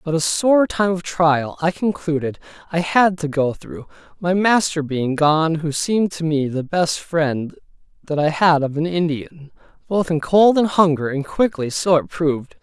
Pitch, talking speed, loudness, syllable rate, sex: 165 Hz, 190 wpm, -19 LUFS, 4.4 syllables/s, male